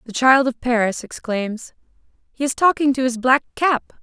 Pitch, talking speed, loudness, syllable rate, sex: 255 Hz, 180 wpm, -19 LUFS, 4.9 syllables/s, female